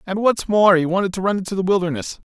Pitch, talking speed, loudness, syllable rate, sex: 190 Hz, 260 wpm, -19 LUFS, 6.6 syllables/s, male